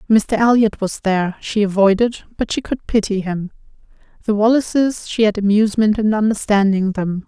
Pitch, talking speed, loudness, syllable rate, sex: 210 Hz, 155 wpm, -17 LUFS, 5.2 syllables/s, female